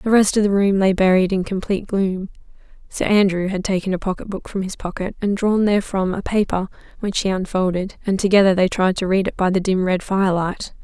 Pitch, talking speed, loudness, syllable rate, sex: 190 Hz, 220 wpm, -19 LUFS, 5.8 syllables/s, female